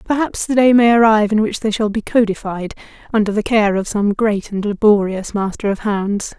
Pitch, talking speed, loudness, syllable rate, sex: 210 Hz, 205 wpm, -16 LUFS, 5.3 syllables/s, female